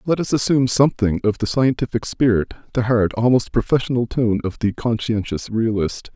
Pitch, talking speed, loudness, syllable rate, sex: 115 Hz, 165 wpm, -19 LUFS, 5.4 syllables/s, male